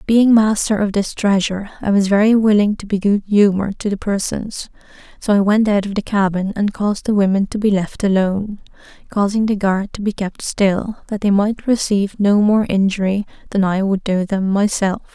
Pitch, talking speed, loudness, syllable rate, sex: 200 Hz, 200 wpm, -17 LUFS, 5.2 syllables/s, female